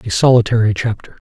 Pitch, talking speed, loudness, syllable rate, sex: 115 Hz, 140 wpm, -14 LUFS, 6.4 syllables/s, male